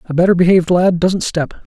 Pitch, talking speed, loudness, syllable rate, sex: 175 Hz, 205 wpm, -14 LUFS, 6.2 syllables/s, male